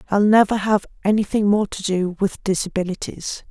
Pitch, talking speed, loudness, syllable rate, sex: 200 Hz, 155 wpm, -20 LUFS, 5.3 syllables/s, female